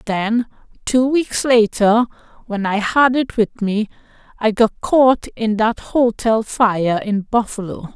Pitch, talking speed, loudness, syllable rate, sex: 225 Hz, 145 wpm, -17 LUFS, 3.6 syllables/s, female